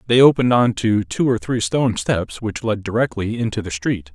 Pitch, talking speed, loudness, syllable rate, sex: 110 Hz, 215 wpm, -19 LUFS, 5.3 syllables/s, male